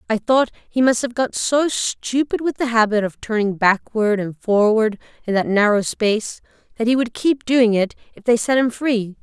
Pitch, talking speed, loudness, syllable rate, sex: 230 Hz, 200 wpm, -19 LUFS, 4.7 syllables/s, female